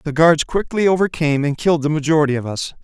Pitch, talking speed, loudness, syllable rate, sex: 155 Hz, 210 wpm, -17 LUFS, 6.6 syllables/s, male